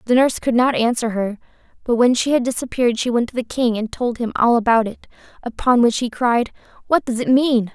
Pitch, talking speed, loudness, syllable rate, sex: 240 Hz, 230 wpm, -18 LUFS, 5.8 syllables/s, female